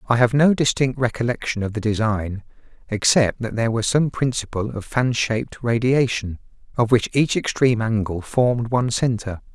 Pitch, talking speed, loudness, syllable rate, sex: 115 Hz, 165 wpm, -20 LUFS, 5.2 syllables/s, male